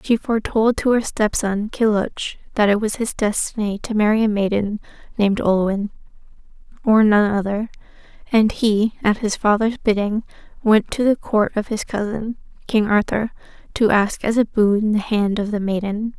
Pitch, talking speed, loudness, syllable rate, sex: 215 Hz, 165 wpm, -19 LUFS, 4.8 syllables/s, female